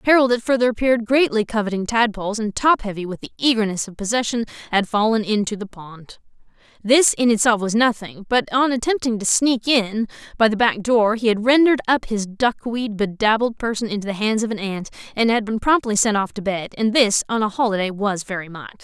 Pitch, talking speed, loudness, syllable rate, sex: 220 Hz, 205 wpm, -19 LUFS, 5.7 syllables/s, female